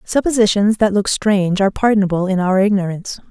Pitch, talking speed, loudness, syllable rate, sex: 200 Hz, 165 wpm, -16 LUFS, 6.4 syllables/s, female